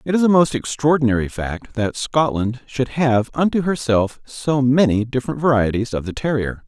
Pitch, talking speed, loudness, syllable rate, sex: 130 Hz, 170 wpm, -19 LUFS, 5.0 syllables/s, male